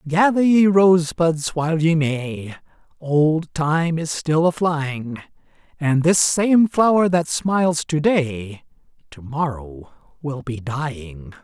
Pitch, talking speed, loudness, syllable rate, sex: 155 Hz, 135 wpm, -19 LUFS, 3.3 syllables/s, male